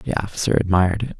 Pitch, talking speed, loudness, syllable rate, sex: 95 Hz, 200 wpm, -20 LUFS, 7.0 syllables/s, male